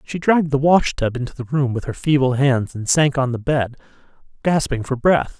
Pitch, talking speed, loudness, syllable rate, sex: 135 Hz, 220 wpm, -19 LUFS, 5.2 syllables/s, male